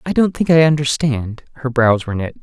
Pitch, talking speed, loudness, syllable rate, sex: 135 Hz, 225 wpm, -16 LUFS, 5.8 syllables/s, male